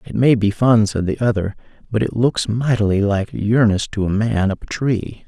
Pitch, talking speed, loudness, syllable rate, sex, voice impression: 110 Hz, 215 wpm, -18 LUFS, 4.8 syllables/s, male, masculine, adult-like, slightly soft, cool, slightly calm, slightly sweet, kind